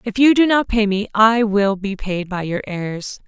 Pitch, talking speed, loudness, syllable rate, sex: 210 Hz, 240 wpm, -17 LUFS, 4.3 syllables/s, female